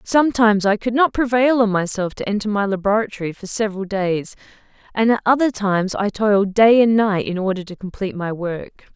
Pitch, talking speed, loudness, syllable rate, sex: 210 Hz, 195 wpm, -18 LUFS, 5.7 syllables/s, female